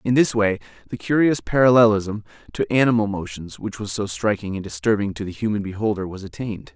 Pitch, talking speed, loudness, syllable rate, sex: 105 Hz, 185 wpm, -21 LUFS, 6.0 syllables/s, male